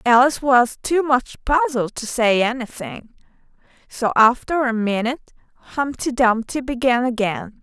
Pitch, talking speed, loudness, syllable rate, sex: 245 Hz, 125 wpm, -19 LUFS, 4.6 syllables/s, female